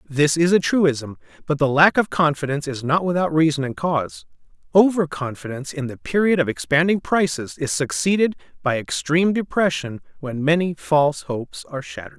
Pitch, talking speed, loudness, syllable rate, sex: 150 Hz, 165 wpm, -20 LUFS, 5.6 syllables/s, male